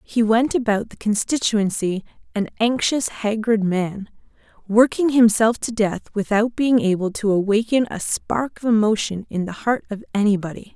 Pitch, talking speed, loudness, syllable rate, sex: 215 Hz, 150 wpm, -20 LUFS, 4.7 syllables/s, female